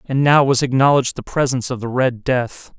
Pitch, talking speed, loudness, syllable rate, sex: 130 Hz, 215 wpm, -17 LUFS, 5.6 syllables/s, male